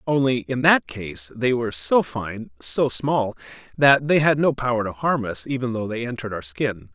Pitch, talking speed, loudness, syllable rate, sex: 120 Hz, 205 wpm, -22 LUFS, 4.8 syllables/s, male